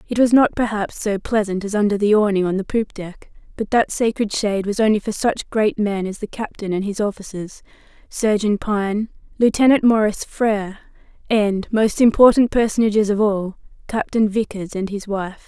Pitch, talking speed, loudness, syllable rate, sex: 210 Hz, 180 wpm, -19 LUFS, 5.1 syllables/s, female